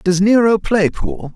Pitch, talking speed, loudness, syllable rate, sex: 195 Hz, 175 wpm, -14 LUFS, 3.8 syllables/s, male